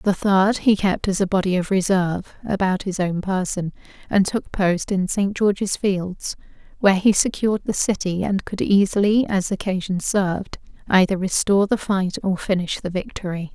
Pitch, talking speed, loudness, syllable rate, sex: 190 Hz, 175 wpm, -21 LUFS, 4.9 syllables/s, female